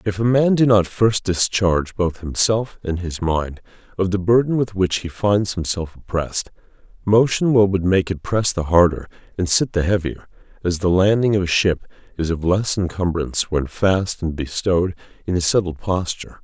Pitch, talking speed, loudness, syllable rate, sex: 95 Hz, 185 wpm, -19 LUFS, 4.9 syllables/s, male